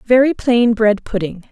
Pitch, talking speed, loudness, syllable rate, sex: 225 Hz, 160 wpm, -15 LUFS, 4.4 syllables/s, female